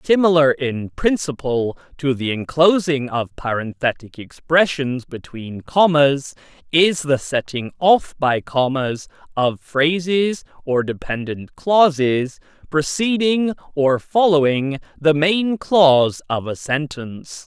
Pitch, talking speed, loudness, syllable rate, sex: 145 Hz, 105 wpm, -18 LUFS, 3.7 syllables/s, male